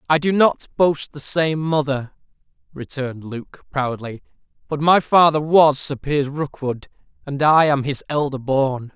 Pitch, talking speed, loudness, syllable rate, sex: 145 Hz, 155 wpm, -19 LUFS, 4.2 syllables/s, male